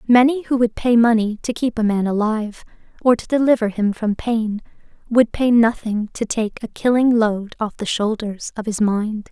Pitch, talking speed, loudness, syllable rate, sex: 225 Hz, 195 wpm, -19 LUFS, 4.8 syllables/s, female